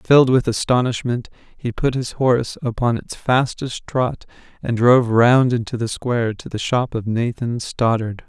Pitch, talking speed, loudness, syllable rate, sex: 120 Hz, 165 wpm, -19 LUFS, 4.6 syllables/s, male